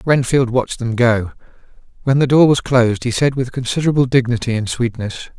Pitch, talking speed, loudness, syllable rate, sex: 125 Hz, 180 wpm, -16 LUFS, 6.0 syllables/s, male